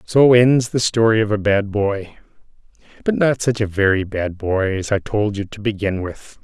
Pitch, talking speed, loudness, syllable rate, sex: 105 Hz, 195 wpm, -18 LUFS, 4.6 syllables/s, male